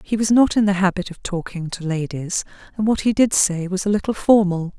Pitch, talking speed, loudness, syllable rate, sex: 190 Hz, 240 wpm, -19 LUFS, 5.5 syllables/s, female